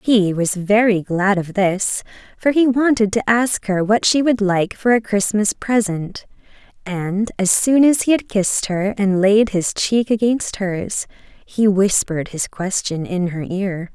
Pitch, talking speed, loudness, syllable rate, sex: 205 Hz, 175 wpm, -18 LUFS, 4.0 syllables/s, female